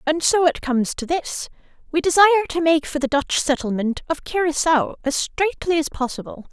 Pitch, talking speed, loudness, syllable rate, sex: 310 Hz, 185 wpm, -20 LUFS, 5.4 syllables/s, female